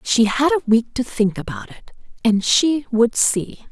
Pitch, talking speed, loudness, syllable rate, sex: 235 Hz, 195 wpm, -18 LUFS, 4.2 syllables/s, female